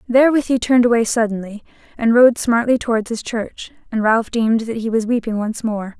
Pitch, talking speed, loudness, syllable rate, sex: 230 Hz, 200 wpm, -17 LUFS, 5.7 syllables/s, female